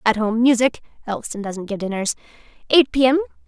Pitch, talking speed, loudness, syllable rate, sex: 230 Hz, 175 wpm, -19 LUFS, 4.3 syllables/s, female